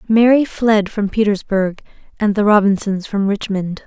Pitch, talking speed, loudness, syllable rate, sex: 205 Hz, 140 wpm, -16 LUFS, 4.5 syllables/s, female